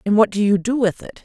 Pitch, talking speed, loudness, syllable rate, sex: 210 Hz, 340 wpm, -18 LUFS, 6.4 syllables/s, female